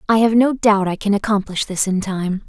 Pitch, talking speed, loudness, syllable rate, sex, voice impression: 205 Hz, 240 wpm, -18 LUFS, 5.3 syllables/s, female, very feminine, young, very thin, relaxed, weak, slightly bright, very soft, clear, very fluent, slightly raspy, very cute, intellectual, refreshing, very sincere, very calm, very friendly, very reassuring, very unique, very elegant, very sweet, very kind, modest, very light